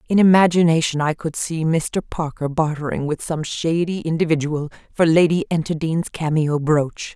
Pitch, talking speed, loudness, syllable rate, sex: 160 Hz, 145 wpm, -19 LUFS, 4.8 syllables/s, female